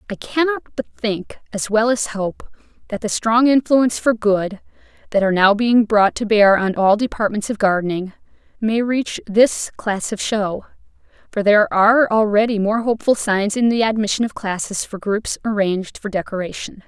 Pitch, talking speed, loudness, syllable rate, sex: 215 Hz, 175 wpm, -18 LUFS, 5.0 syllables/s, female